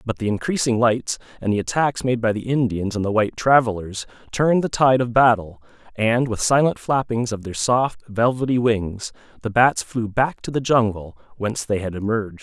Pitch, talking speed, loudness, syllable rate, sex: 115 Hz, 195 wpm, -20 LUFS, 5.2 syllables/s, male